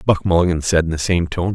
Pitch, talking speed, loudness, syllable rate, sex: 85 Hz, 275 wpm, -18 LUFS, 6.3 syllables/s, male